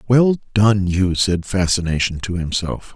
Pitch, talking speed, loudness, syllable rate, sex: 95 Hz, 140 wpm, -18 LUFS, 4.2 syllables/s, male